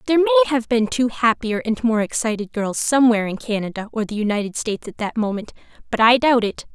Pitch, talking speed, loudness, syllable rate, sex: 230 Hz, 215 wpm, -20 LUFS, 6.3 syllables/s, female